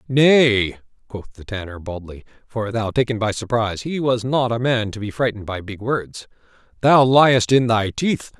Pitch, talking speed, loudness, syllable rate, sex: 115 Hz, 170 wpm, -19 LUFS, 4.7 syllables/s, male